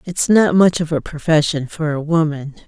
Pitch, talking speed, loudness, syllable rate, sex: 160 Hz, 200 wpm, -16 LUFS, 4.8 syllables/s, female